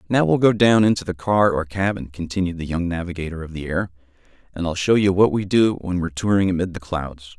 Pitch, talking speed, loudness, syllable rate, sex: 90 Hz, 235 wpm, -20 LUFS, 6.1 syllables/s, male